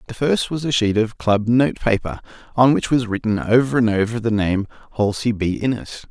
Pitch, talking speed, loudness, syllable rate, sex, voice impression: 115 Hz, 205 wpm, -19 LUFS, 5.2 syllables/s, male, very masculine, slightly middle-aged, slightly thick, tensed, powerful, very bright, slightly hard, very clear, very fluent, cool, slightly intellectual, very refreshing, slightly calm, slightly mature, friendly, reassuring, very unique, slightly elegant, wild, sweet, very lively, kind, intense, slightly light